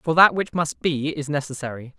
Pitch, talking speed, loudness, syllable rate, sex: 150 Hz, 210 wpm, -22 LUFS, 5.2 syllables/s, male